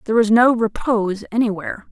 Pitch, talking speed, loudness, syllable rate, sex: 220 Hz, 155 wpm, -18 LUFS, 6.5 syllables/s, female